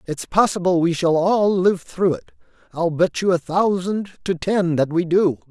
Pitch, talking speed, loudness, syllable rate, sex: 180 Hz, 195 wpm, -19 LUFS, 4.5 syllables/s, male